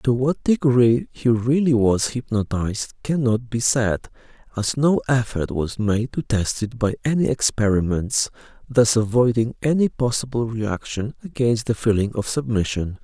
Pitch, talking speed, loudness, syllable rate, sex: 120 Hz, 145 wpm, -21 LUFS, 4.5 syllables/s, male